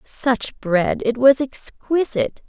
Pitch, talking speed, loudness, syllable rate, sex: 245 Hz, 120 wpm, -19 LUFS, 3.5 syllables/s, female